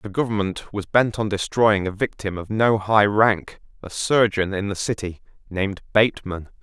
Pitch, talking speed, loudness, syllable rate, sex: 100 Hz, 170 wpm, -21 LUFS, 4.7 syllables/s, male